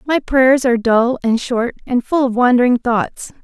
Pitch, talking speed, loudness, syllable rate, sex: 245 Hz, 190 wpm, -15 LUFS, 4.6 syllables/s, female